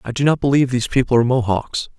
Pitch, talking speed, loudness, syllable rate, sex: 125 Hz, 240 wpm, -18 LUFS, 7.7 syllables/s, male